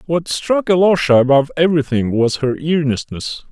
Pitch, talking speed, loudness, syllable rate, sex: 150 Hz, 135 wpm, -16 LUFS, 5.2 syllables/s, male